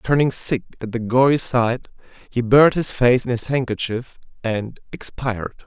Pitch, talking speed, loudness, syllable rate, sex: 120 Hz, 160 wpm, -20 LUFS, 4.7 syllables/s, male